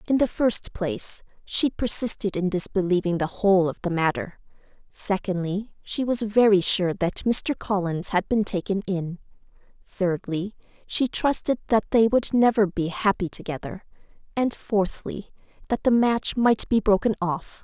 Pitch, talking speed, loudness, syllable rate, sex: 200 Hz, 150 wpm, -23 LUFS, 4.5 syllables/s, female